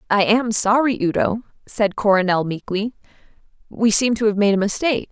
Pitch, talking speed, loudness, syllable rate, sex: 210 Hz, 165 wpm, -19 LUFS, 5.4 syllables/s, female